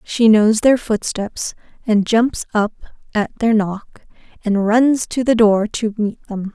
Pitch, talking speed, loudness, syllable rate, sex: 220 Hz, 165 wpm, -17 LUFS, 3.7 syllables/s, female